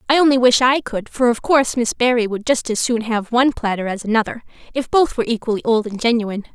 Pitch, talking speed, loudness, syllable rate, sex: 235 Hz, 240 wpm, -18 LUFS, 6.4 syllables/s, female